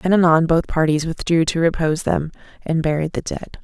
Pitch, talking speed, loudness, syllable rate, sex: 165 Hz, 200 wpm, -19 LUFS, 5.5 syllables/s, female